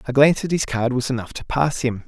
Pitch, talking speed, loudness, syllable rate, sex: 130 Hz, 290 wpm, -21 LUFS, 6.3 syllables/s, male